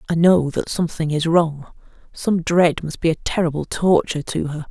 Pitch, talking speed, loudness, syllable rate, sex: 165 Hz, 190 wpm, -19 LUFS, 5.2 syllables/s, female